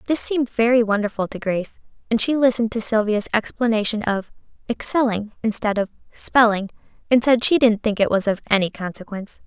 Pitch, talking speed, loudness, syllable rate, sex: 220 Hz, 170 wpm, -20 LUFS, 6.0 syllables/s, female